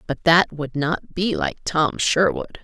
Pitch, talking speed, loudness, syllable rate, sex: 160 Hz, 185 wpm, -20 LUFS, 3.6 syllables/s, female